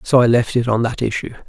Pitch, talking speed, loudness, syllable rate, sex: 120 Hz, 285 wpm, -17 LUFS, 6.3 syllables/s, male